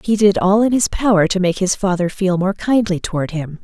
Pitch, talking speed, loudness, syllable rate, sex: 190 Hz, 245 wpm, -16 LUFS, 5.4 syllables/s, female